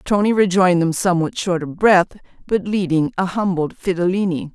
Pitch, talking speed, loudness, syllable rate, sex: 185 Hz, 160 wpm, -18 LUFS, 5.4 syllables/s, female